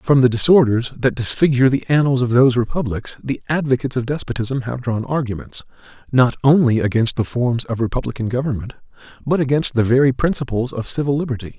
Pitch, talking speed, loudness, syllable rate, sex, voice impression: 125 Hz, 170 wpm, -18 LUFS, 6.1 syllables/s, male, very masculine, very adult-like, middle-aged, very thick, slightly relaxed, slightly weak, slightly bright, soft, slightly muffled, fluent, slightly raspy, cool, very intellectual, slightly refreshing, very sincere, very calm, friendly, very reassuring, unique, very elegant, slightly wild, very sweet, slightly lively, very kind, slightly modest